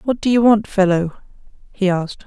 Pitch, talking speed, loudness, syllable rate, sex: 200 Hz, 185 wpm, -17 LUFS, 5.5 syllables/s, female